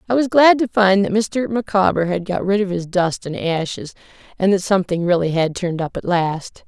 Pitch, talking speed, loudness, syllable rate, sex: 190 Hz, 225 wpm, -18 LUFS, 5.3 syllables/s, female